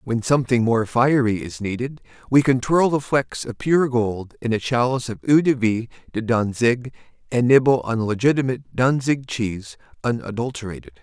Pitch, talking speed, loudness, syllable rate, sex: 120 Hz, 165 wpm, -21 LUFS, 5.3 syllables/s, male